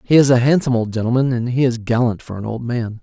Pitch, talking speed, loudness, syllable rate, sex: 120 Hz, 280 wpm, -17 LUFS, 6.5 syllables/s, male